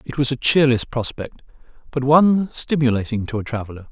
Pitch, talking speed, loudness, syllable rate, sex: 130 Hz, 170 wpm, -19 LUFS, 5.8 syllables/s, male